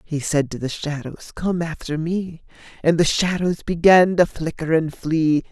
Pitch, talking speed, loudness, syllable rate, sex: 160 Hz, 175 wpm, -20 LUFS, 4.3 syllables/s, male